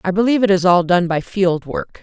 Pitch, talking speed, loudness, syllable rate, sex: 185 Hz, 265 wpm, -16 LUFS, 5.7 syllables/s, female